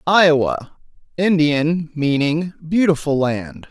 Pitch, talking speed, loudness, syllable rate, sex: 160 Hz, 65 wpm, -18 LUFS, 3.6 syllables/s, male